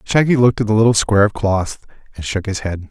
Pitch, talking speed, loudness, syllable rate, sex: 105 Hz, 250 wpm, -16 LUFS, 6.4 syllables/s, male